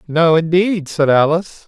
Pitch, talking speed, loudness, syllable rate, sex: 165 Hz, 145 wpm, -15 LUFS, 4.6 syllables/s, male